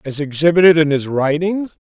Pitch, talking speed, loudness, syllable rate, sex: 160 Hz, 160 wpm, -15 LUFS, 5.5 syllables/s, female